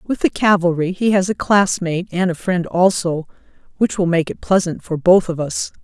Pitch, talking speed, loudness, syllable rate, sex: 180 Hz, 205 wpm, -17 LUFS, 5.0 syllables/s, female